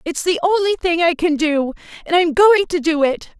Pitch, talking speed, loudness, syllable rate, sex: 335 Hz, 250 wpm, -16 LUFS, 6.4 syllables/s, female